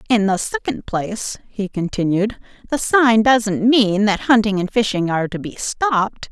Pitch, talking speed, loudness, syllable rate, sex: 215 Hz, 170 wpm, -18 LUFS, 4.6 syllables/s, female